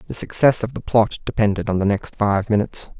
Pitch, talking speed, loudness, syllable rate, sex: 105 Hz, 220 wpm, -20 LUFS, 5.9 syllables/s, male